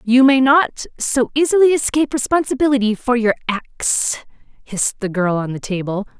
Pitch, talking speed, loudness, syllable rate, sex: 245 Hz, 155 wpm, -17 LUFS, 5.2 syllables/s, female